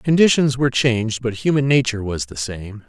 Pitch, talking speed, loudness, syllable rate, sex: 125 Hz, 190 wpm, -18 LUFS, 5.7 syllables/s, male